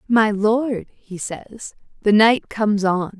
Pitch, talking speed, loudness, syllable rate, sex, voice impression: 210 Hz, 150 wpm, -19 LUFS, 3.3 syllables/s, female, feminine, adult-like, tensed, powerful, bright, clear, intellectual, slightly calm, elegant, lively, sharp